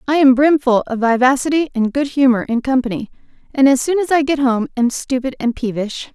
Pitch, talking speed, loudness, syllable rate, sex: 260 Hz, 205 wpm, -16 LUFS, 5.7 syllables/s, female